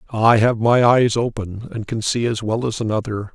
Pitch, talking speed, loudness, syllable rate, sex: 115 Hz, 215 wpm, -19 LUFS, 4.8 syllables/s, male